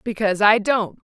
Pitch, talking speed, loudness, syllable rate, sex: 210 Hz, 165 wpm, -18 LUFS, 5.5 syllables/s, female